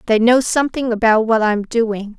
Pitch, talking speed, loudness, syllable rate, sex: 225 Hz, 190 wpm, -16 LUFS, 4.9 syllables/s, female